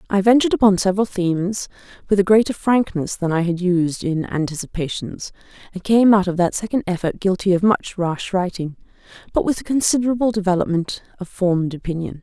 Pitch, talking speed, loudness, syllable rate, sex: 190 Hz, 170 wpm, -19 LUFS, 5.8 syllables/s, female